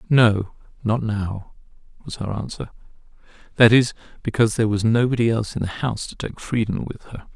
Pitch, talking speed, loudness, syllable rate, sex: 110 Hz, 170 wpm, -21 LUFS, 5.8 syllables/s, male